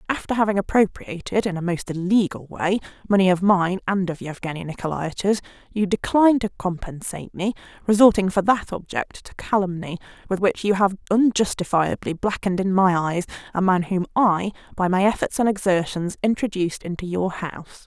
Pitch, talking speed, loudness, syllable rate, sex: 190 Hz, 160 wpm, -22 LUFS, 5.5 syllables/s, female